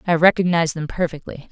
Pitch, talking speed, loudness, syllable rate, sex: 165 Hz, 160 wpm, -19 LUFS, 6.6 syllables/s, female